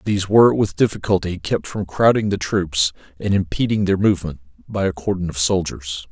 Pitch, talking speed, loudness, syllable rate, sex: 95 Hz, 175 wpm, -19 LUFS, 5.6 syllables/s, male